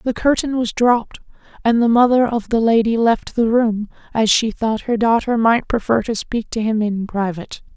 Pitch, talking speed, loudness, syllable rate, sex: 225 Hz, 200 wpm, -17 LUFS, 4.9 syllables/s, female